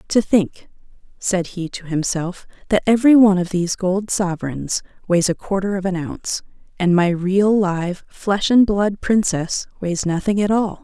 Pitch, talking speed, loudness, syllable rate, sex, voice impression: 190 Hz, 170 wpm, -19 LUFS, 4.6 syllables/s, female, feminine, adult-like, slightly relaxed, clear, fluent, raspy, intellectual, elegant, lively, slightly strict, slightly sharp